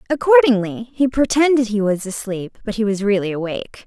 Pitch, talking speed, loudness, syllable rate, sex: 225 Hz, 170 wpm, -18 LUFS, 5.6 syllables/s, female